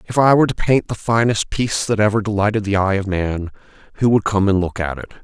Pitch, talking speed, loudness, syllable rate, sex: 105 Hz, 250 wpm, -18 LUFS, 6.2 syllables/s, male